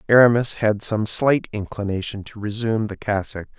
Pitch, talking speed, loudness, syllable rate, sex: 105 Hz, 150 wpm, -21 LUFS, 5.2 syllables/s, male